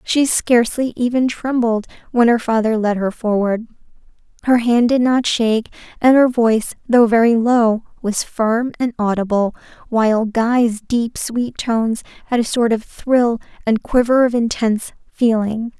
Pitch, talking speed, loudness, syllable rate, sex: 230 Hz, 150 wpm, -17 LUFS, 4.5 syllables/s, female